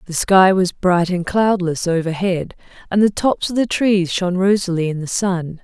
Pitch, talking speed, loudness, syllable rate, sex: 185 Hz, 190 wpm, -17 LUFS, 4.7 syllables/s, female